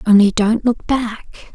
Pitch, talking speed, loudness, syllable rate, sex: 220 Hz, 155 wpm, -16 LUFS, 3.5 syllables/s, female